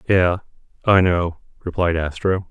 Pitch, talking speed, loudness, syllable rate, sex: 90 Hz, 120 wpm, -20 LUFS, 4.1 syllables/s, male